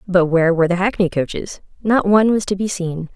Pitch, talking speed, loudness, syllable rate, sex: 185 Hz, 230 wpm, -17 LUFS, 6.2 syllables/s, female